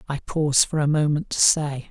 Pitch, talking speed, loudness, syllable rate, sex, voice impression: 145 Hz, 220 wpm, -21 LUFS, 5.2 syllables/s, male, very feminine, slightly old, very thin, relaxed, weak, slightly dark, very soft, very muffled, halting, raspy, intellectual, slightly refreshing, very sincere, very calm, very mature, slightly friendly, slightly reassuring, very unique, very elegant, slightly sweet, slightly lively, very kind, very modest, very light